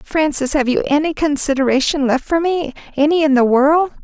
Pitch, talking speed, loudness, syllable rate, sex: 290 Hz, 165 wpm, -16 LUFS, 5.3 syllables/s, female